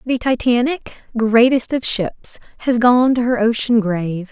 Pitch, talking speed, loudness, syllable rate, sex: 235 Hz, 155 wpm, -16 LUFS, 4.3 syllables/s, female